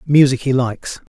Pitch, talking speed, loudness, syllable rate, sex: 135 Hz, 155 wpm, -16 LUFS, 5.3 syllables/s, male